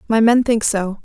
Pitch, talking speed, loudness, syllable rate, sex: 220 Hz, 230 wpm, -16 LUFS, 4.8 syllables/s, female